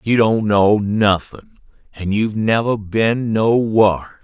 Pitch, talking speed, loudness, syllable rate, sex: 105 Hz, 125 wpm, -16 LUFS, 3.2 syllables/s, male